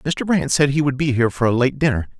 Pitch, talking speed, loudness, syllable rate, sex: 135 Hz, 300 wpm, -18 LUFS, 6.3 syllables/s, male